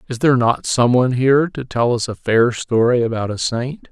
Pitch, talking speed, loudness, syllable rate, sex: 125 Hz, 230 wpm, -17 LUFS, 5.4 syllables/s, male